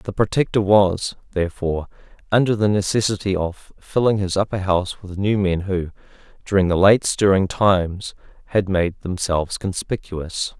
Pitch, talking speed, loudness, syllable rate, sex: 95 Hz, 140 wpm, -20 LUFS, 4.9 syllables/s, male